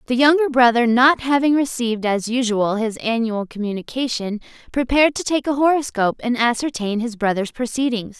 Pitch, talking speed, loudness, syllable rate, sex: 240 Hz, 155 wpm, -19 LUFS, 5.5 syllables/s, female